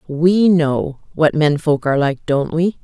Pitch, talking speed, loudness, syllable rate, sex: 155 Hz, 190 wpm, -16 LUFS, 4.0 syllables/s, female